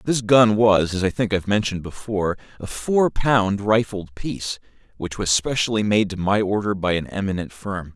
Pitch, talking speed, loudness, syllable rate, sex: 105 Hz, 195 wpm, -21 LUFS, 5.1 syllables/s, male